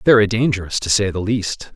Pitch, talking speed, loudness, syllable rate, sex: 105 Hz, 205 wpm, -18 LUFS, 5.3 syllables/s, male